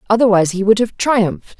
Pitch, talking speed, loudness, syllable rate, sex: 210 Hz, 190 wpm, -15 LUFS, 6.5 syllables/s, female